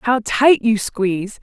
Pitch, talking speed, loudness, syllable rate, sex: 225 Hz, 170 wpm, -16 LUFS, 3.9 syllables/s, female